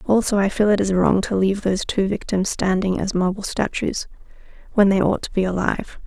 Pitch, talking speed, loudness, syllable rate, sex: 195 Hz, 210 wpm, -20 LUFS, 5.8 syllables/s, female